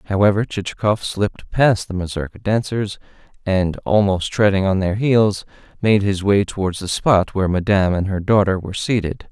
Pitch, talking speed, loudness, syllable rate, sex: 100 Hz, 165 wpm, -18 LUFS, 5.2 syllables/s, male